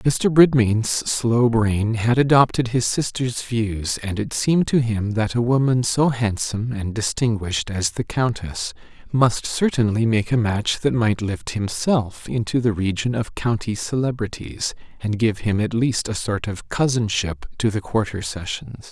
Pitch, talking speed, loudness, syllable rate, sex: 110 Hz, 165 wpm, -21 LUFS, 4.2 syllables/s, male